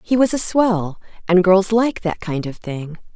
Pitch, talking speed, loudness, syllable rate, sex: 190 Hz, 210 wpm, -18 LUFS, 4.2 syllables/s, female